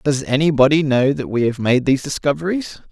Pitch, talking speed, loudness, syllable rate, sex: 140 Hz, 185 wpm, -17 LUFS, 5.8 syllables/s, male